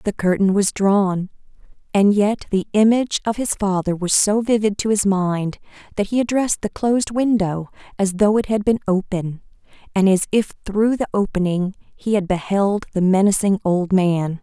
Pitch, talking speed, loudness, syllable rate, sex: 200 Hz, 175 wpm, -19 LUFS, 4.8 syllables/s, female